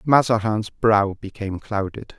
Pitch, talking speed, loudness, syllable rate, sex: 105 Hz, 110 wpm, -21 LUFS, 4.4 syllables/s, male